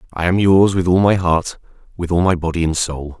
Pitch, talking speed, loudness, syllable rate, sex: 90 Hz, 245 wpm, -16 LUFS, 5.7 syllables/s, male